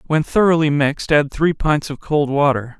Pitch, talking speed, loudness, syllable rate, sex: 145 Hz, 195 wpm, -17 LUFS, 5.0 syllables/s, male